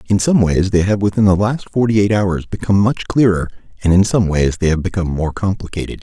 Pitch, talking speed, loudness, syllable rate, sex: 95 Hz, 230 wpm, -16 LUFS, 6.0 syllables/s, male